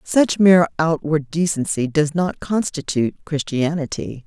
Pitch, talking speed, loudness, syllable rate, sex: 160 Hz, 115 wpm, -19 LUFS, 4.4 syllables/s, female